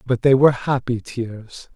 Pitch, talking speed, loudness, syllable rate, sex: 120 Hz, 170 wpm, -19 LUFS, 4.4 syllables/s, male